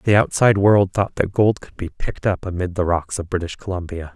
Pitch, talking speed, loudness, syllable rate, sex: 95 Hz, 230 wpm, -20 LUFS, 5.6 syllables/s, male